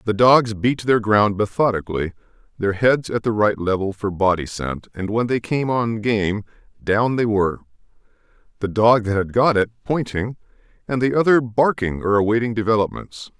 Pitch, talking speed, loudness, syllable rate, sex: 110 Hz, 170 wpm, -20 LUFS, 5.0 syllables/s, male